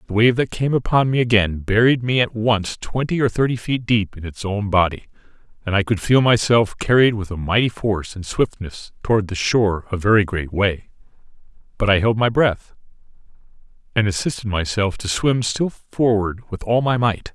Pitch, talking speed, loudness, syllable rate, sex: 110 Hz, 190 wpm, -19 LUFS, 5.1 syllables/s, male